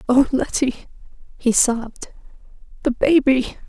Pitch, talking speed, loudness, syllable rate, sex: 260 Hz, 80 wpm, -19 LUFS, 4.3 syllables/s, female